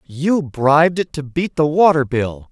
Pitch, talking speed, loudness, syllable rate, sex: 150 Hz, 190 wpm, -16 LUFS, 4.3 syllables/s, male